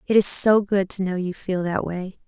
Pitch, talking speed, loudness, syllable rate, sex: 190 Hz, 265 wpm, -20 LUFS, 4.9 syllables/s, female